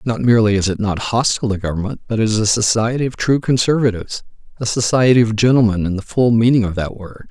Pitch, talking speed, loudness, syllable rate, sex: 110 Hz, 215 wpm, -16 LUFS, 6.5 syllables/s, male